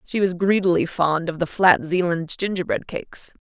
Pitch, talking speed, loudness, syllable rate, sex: 175 Hz, 175 wpm, -21 LUFS, 5.0 syllables/s, female